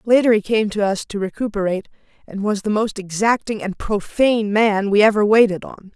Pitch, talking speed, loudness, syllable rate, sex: 210 Hz, 190 wpm, -18 LUFS, 5.5 syllables/s, female